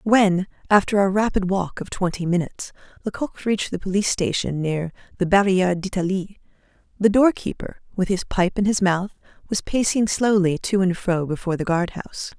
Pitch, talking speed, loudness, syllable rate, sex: 190 Hz, 170 wpm, -21 LUFS, 5.4 syllables/s, female